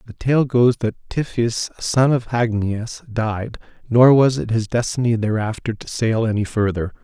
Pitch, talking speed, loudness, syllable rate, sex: 115 Hz, 160 wpm, -19 LUFS, 4.4 syllables/s, male